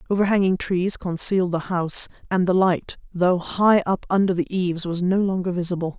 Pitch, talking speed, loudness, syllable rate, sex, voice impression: 180 Hz, 180 wpm, -21 LUFS, 5.4 syllables/s, female, feminine, middle-aged, tensed, powerful, hard, clear, slightly fluent, intellectual, slightly calm, strict, sharp